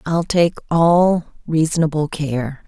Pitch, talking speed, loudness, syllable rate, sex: 160 Hz, 110 wpm, -18 LUFS, 3.6 syllables/s, female